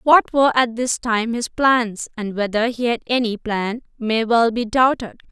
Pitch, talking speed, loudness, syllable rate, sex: 235 Hz, 190 wpm, -19 LUFS, 4.4 syllables/s, female